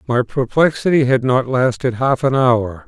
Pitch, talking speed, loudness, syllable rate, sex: 130 Hz, 165 wpm, -16 LUFS, 4.5 syllables/s, male